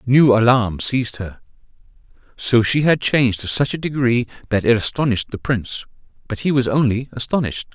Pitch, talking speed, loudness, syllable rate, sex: 120 Hz, 170 wpm, -18 LUFS, 5.7 syllables/s, male